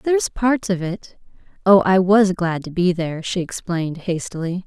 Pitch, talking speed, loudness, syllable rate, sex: 185 Hz, 165 wpm, -19 LUFS, 4.9 syllables/s, female